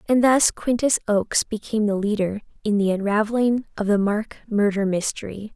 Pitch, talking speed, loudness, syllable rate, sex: 210 Hz, 160 wpm, -22 LUFS, 5.4 syllables/s, female